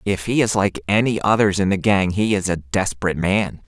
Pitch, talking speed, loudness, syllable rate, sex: 100 Hz, 230 wpm, -19 LUFS, 5.5 syllables/s, male